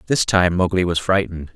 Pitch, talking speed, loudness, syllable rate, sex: 90 Hz, 195 wpm, -18 LUFS, 5.9 syllables/s, male